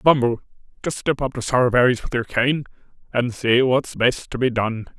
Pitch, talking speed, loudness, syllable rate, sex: 125 Hz, 190 wpm, -21 LUFS, 5.2 syllables/s, male